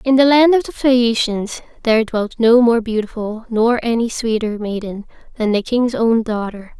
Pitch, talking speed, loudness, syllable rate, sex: 230 Hz, 175 wpm, -16 LUFS, 4.6 syllables/s, female